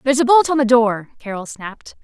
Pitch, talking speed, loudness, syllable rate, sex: 245 Hz, 235 wpm, -15 LUFS, 6.0 syllables/s, female